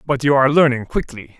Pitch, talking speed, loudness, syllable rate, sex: 130 Hz, 215 wpm, -16 LUFS, 6.2 syllables/s, male